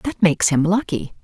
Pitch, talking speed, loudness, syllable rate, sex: 190 Hz, 195 wpm, -18 LUFS, 5.3 syllables/s, female